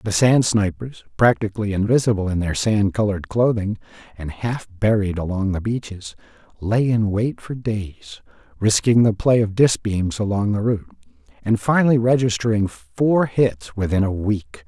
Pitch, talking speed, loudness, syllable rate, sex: 105 Hz, 155 wpm, -20 LUFS, 4.7 syllables/s, male